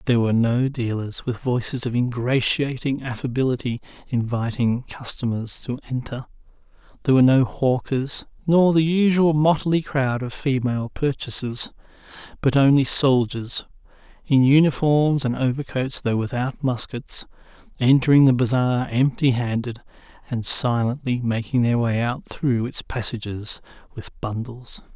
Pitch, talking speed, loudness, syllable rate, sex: 125 Hz, 125 wpm, -21 LUFS, 4.6 syllables/s, male